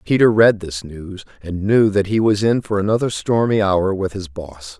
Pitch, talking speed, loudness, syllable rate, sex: 100 Hz, 215 wpm, -17 LUFS, 4.7 syllables/s, male